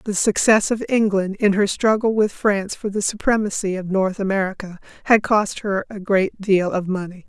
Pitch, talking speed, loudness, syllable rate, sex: 200 Hz, 190 wpm, -20 LUFS, 5.0 syllables/s, female